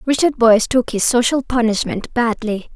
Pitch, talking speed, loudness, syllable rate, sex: 235 Hz, 155 wpm, -16 LUFS, 5.1 syllables/s, female